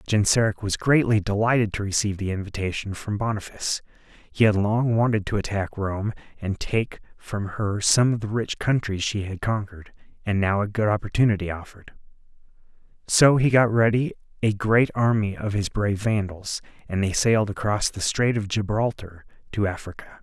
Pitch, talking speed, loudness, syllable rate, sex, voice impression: 105 Hz, 165 wpm, -23 LUFS, 5.3 syllables/s, male, very masculine, very adult-like, slightly middle-aged, thick, slightly relaxed, slightly weak, bright, very soft, very clear, fluent, slightly raspy, cool, very intellectual, very refreshing, sincere, calm, slightly mature, very friendly, very reassuring, very unique, elegant, very wild, very sweet, very lively, very kind, slightly intense, slightly modest, slightly light